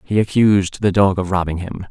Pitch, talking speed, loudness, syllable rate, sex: 95 Hz, 220 wpm, -17 LUFS, 5.6 syllables/s, male